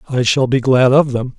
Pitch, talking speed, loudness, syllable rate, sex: 130 Hz, 260 wpm, -14 LUFS, 5.1 syllables/s, male